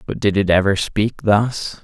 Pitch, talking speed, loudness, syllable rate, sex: 100 Hz, 195 wpm, -17 LUFS, 4.1 syllables/s, male